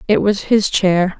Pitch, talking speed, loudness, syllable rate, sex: 195 Hz, 200 wpm, -15 LUFS, 3.9 syllables/s, female